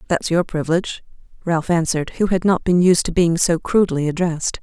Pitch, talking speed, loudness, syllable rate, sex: 170 Hz, 195 wpm, -18 LUFS, 6.0 syllables/s, female